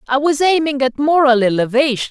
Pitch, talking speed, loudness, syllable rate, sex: 275 Hz, 170 wpm, -15 LUFS, 5.6 syllables/s, female